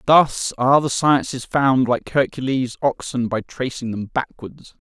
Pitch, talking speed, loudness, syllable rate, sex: 130 Hz, 145 wpm, -20 LUFS, 4.2 syllables/s, male